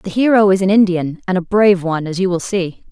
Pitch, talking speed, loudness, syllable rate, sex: 190 Hz, 265 wpm, -15 LUFS, 6.1 syllables/s, female